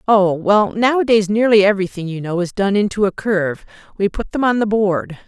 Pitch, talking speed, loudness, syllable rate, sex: 200 Hz, 205 wpm, -17 LUFS, 5.5 syllables/s, female